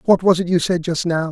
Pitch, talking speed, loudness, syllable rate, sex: 175 Hz, 320 wpm, -18 LUFS, 6.0 syllables/s, male